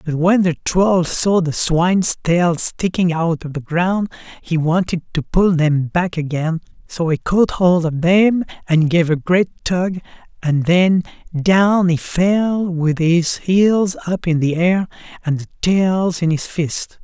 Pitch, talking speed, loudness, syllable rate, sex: 175 Hz, 175 wpm, -17 LUFS, 3.6 syllables/s, male